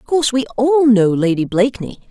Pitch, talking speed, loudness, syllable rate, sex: 240 Hz, 200 wpm, -15 LUFS, 5.3 syllables/s, female